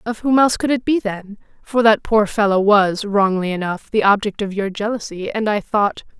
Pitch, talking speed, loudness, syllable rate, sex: 210 Hz, 215 wpm, -18 LUFS, 5.1 syllables/s, female